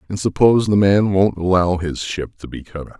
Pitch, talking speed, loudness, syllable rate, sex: 95 Hz, 240 wpm, -17 LUFS, 5.5 syllables/s, male